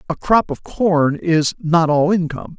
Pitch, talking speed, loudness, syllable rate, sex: 170 Hz, 185 wpm, -17 LUFS, 4.2 syllables/s, male